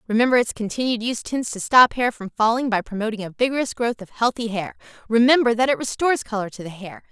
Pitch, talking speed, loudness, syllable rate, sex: 230 Hz, 220 wpm, -21 LUFS, 6.4 syllables/s, female